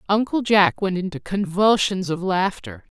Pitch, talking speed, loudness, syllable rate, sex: 195 Hz, 140 wpm, -20 LUFS, 4.5 syllables/s, female